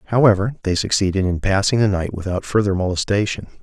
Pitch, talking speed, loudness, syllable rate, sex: 100 Hz, 165 wpm, -19 LUFS, 6.4 syllables/s, male